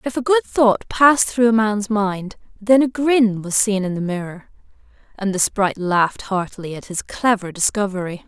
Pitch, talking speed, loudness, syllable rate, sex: 210 Hz, 190 wpm, -18 LUFS, 5.0 syllables/s, female